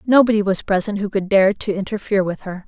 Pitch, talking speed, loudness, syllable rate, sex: 200 Hz, 225 wpm, -19 LUFS, 6.3 syllables/s, female